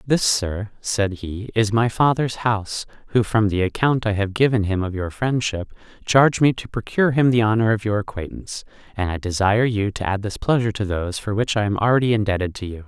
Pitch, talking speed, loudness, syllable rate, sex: 110 Hz, 220 wpm, -21 LUFS, 5.8 syllables/s, male